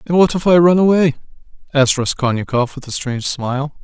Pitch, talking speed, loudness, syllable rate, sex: 145 Hz, 190 wpm, -16 LUFS, 6.1 syllables/s, male